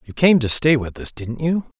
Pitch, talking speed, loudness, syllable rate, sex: 130 Hz, 265 wpm, -19 LUFS, 5.0 syllables/s, male